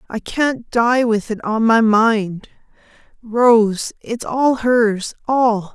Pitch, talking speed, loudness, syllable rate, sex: 225 Hz, 115 wpm, -16 LUFS, 2.8 syllables/s, female